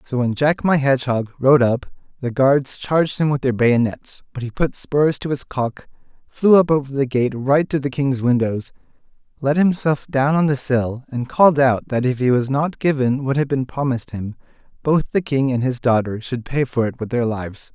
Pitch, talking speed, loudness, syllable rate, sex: 135 Hz, 215 wpm, -19 LUFS, 5.0 syllables/s, male